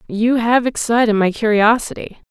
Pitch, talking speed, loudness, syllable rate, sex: 225 Hz, 130 wpm, -15 LUFS, 4.9 syllables/s, female